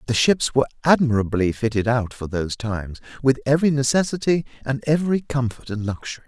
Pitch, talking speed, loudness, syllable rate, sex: 125 Hz, 165 wpm, -21 LUFS, 6.3 syllables/s, male